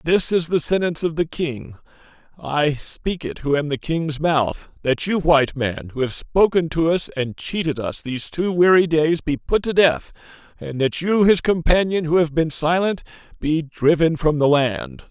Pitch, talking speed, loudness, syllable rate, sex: 155 Hz, 195 wpm, -20 LUFS, 4.5 syllables/s, male